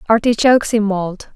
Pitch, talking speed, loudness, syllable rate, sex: 215 Hz, 135 wpm, -15 LUFS, 5.3 syllables/s, female